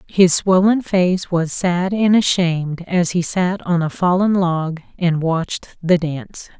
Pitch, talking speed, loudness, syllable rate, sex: 175 Hz, 165 wpm, -17 LUFS, 4.0 syllables/s, female